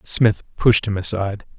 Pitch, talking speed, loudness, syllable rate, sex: 105 Hz, 150 wpm, -19 LUFS, 4.8 syllables/s, male